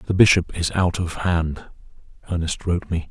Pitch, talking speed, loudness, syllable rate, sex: 85 Hz, 175 wpm, -21 LUFS, 5.0 syllables/s, male